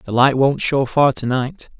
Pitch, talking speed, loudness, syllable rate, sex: 135 Hz, 200 wpm, -17 LUFS, 4.1 syllables/s, male